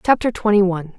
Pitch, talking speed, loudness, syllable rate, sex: 200 Hz, 185 wpm, -17 LUFS, 7.0 syllables/s, female